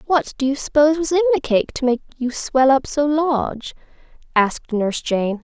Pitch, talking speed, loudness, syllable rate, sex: 275 Hz, 195 wpm, -19 LUFS, 5.0 syllables/s, female